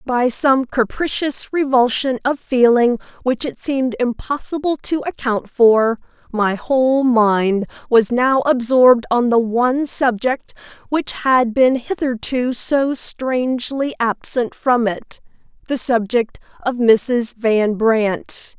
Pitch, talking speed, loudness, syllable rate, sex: 245 Hz, 120 wpm, -17 LUFS, 3.6 syllables/s, female